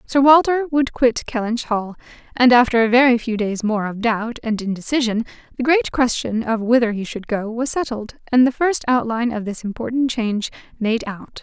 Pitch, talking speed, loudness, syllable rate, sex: 235 Hz, 195 wpm, -19 LUFS, 5.2 syllables/s, female